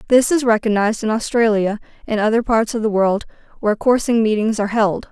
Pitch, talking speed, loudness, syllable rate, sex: 220 Hz, 190 wpm, -17 LUFS, 6.1 syllables/s, female